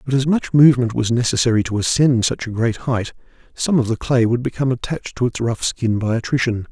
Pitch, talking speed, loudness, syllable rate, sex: 120 Hz, 225 wpm, -18 LUFS, 6.0 syllables/s, male